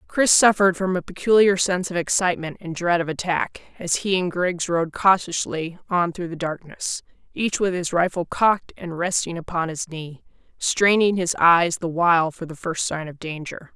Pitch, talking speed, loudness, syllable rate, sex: 175 Hz, 190 wpm, -21 LUFS, 4.9 syllables/s, female